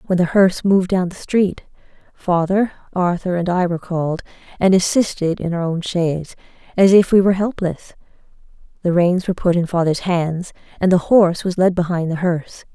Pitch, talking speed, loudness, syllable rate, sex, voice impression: 180 Hz, 185 wpm, -18 LUFS, 5.6 syllables/s, female, feminine, adult-like, slightly hard, slightly muffled, fluent, intellectual, calm, elegant, slightly strict, slightly sharp